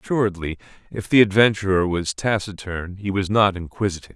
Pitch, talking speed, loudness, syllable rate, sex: 95 Hz, 145 wpm, -21 LUFS, 6.0 syllables/s, male